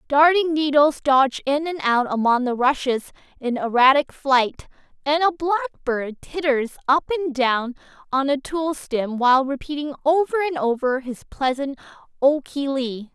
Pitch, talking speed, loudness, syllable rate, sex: 280 Hz, 150 wpm, -21 LUFS, 4.5 syllables/s, female